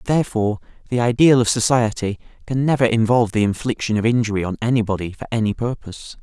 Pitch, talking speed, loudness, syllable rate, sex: 115 Hz, 165 wpm, -19 LUFS, 6.7 syllables/s, male